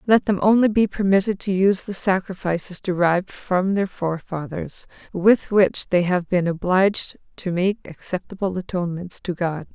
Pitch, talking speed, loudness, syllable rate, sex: 185 Hz, 155 wpm, -21 LUFS, 5.0 syllables/s, female